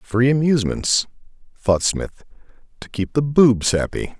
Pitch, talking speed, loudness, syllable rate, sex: 120 Hz, 130 wpm, -19 LUFS, 4.2 syllables/s, male